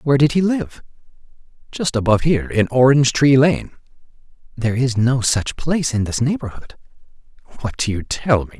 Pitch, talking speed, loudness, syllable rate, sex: 130 Hz, 170 wpm, -18 LUFS, 5.7 syllables/s, male